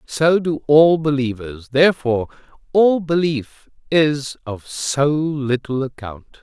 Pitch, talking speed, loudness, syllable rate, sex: 140 Hz, 110 wpm, -18 LUFS, 3.7 syllables/s, male